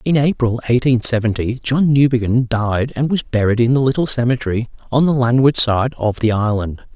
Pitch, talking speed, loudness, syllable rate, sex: 120 Hz, 180 wpm, -16 LUFS, 5.3 syllables/s, male